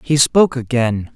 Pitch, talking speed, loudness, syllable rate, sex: 130 Hz, 155 wpm, -15 LUFS, 4.8 syllables/s, male